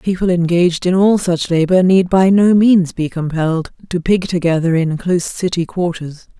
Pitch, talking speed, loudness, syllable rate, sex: 175 Hz, 180 wpm, -15 LUFS, 4.9 syllables/s, female